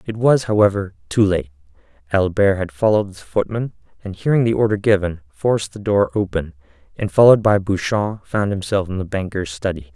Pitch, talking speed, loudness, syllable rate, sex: 95 Hz, 175 wpm, -19 LUFS, 5.6 syllables/s, male